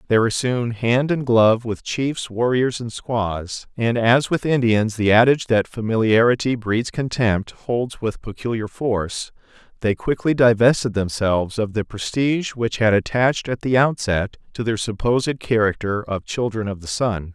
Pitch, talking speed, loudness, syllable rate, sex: 115 Hz, 165 wpm, -20 LUFS, 4.6 syllables/s, male